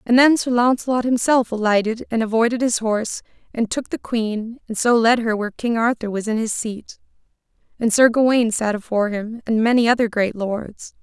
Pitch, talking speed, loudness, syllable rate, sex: 230 Hz, 195 wpm, -19 LUFS, 5.4 syllables/s, female